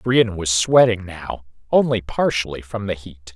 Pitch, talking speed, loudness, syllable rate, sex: 100 Hz, 160 wpm, -19 LUFS, 4.3 syllables/s, male